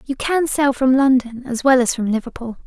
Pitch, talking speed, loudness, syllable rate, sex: 255 Hz, 225 wpm, -17 LUFS, 5.2 syllables/s, female